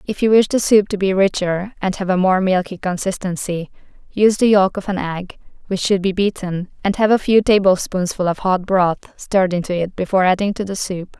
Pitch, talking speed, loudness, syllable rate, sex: 190 Hz, 215 wpm, -17 LUFS, 5.4 syllables/s, female